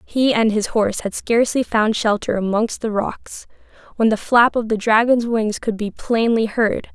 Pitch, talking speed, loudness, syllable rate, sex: 220 Hz, 190 wpm, -18 LUFS, 4.6 syllables/s, female